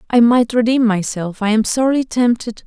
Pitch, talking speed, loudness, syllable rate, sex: 230 Hz, 160 wpm, -16 LUFS, 5.3 syllables/s, female